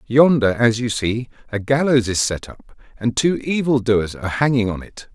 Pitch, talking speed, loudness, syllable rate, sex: 120 Hz, 200 wpm, -19 LUFS, 4.7 syllables/s, male